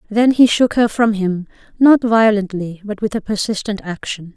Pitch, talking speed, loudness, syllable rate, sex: 210 Hz, 180 wpm, -16 LUFS, 4.7 syllables/s, female